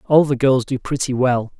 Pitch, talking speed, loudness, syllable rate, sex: 130 Hz, 225 wpm, -18 LUFS, 4.8 syllables/s, male